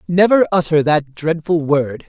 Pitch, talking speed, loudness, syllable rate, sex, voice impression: 160 Hz, 145 wpm, -16 LUFS, 4.3 syllables/s, male, masculine, adult-like, clear, fluent, sincere, slightly elegant, slightly sweet